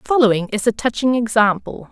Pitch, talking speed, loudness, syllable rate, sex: 225 Hz, 155 wpm, -17 LUFS, 5.7 syllables/s, female